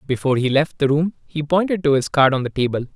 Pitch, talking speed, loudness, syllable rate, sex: 150 Hz, 265 wpm, -19 LUFS, 6.5 syllables/s, male